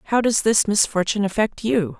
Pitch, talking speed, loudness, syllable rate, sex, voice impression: 210 Hz, 180 wpm, -20 LUFS, 5.7 syllables/s, female, feminine, slightly gender-neutral, very adult-like, slightly middle-aged, slightly thin, slightly relaxed, slightly dark, slightly hard, slightly muffled, very fluent, slightly cool, very intellectual, very sincere, calm, slightly kind